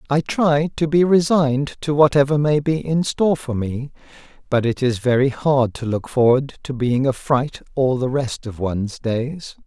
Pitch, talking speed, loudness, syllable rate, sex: 135 Hz, 190 wpm, -19 LUFS, 4.6 syllables/s, male